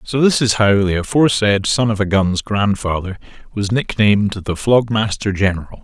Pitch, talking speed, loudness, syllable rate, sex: 105 Hz, 165 wpm, -16 LUFS, 5.0 syllables/s, male